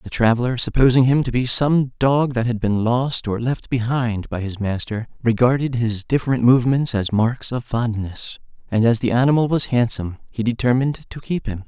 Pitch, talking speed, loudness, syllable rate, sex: 120 Hz, 190 wpm, -19 LUFS, 5.2 syllables/s, male